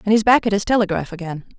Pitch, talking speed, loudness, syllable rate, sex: 200 Hz, 265 wpm, -18 LUFS, 7.2 syllables/s, female